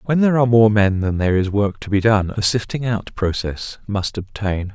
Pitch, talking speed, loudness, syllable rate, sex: 105 Hz, 230 wpm, -18 LUFS, 5.3 syllables/s, male